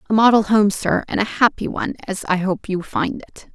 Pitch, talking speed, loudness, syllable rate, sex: 205 Hz, 235 wpm, -19 LUFS, 5.2 syllables/s, female